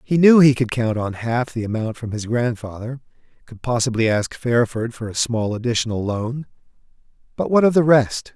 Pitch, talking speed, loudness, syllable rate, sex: 120 Hz, 180 wpm, -19 LUFS, 5.1 syllables/s, male